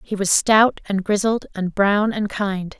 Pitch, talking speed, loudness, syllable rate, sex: 200 Hz, 195 wpm, -19 LUFS, 3.9 syllables/s, female